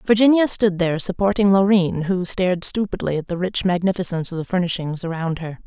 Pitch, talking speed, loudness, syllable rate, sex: 185 Hz, 180 wpm, -20 LUFS, 6.0 syllables/s, female